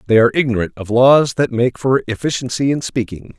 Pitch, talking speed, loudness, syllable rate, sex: 120 Hz, 195 wpm, -16 LUFS, 5.7 syllables/s, male